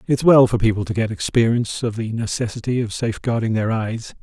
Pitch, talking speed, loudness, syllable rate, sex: 115 Hz, 200 wpm, -20 LUFS, 6.0 syllables/s, male